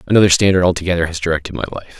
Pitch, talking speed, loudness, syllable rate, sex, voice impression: 90 Hz, 210 wpm, -16 LUFS, 8.5 syllables/s, male, very masculine, adult-like, slightly thick, fluent, cool, sincere, slightly calm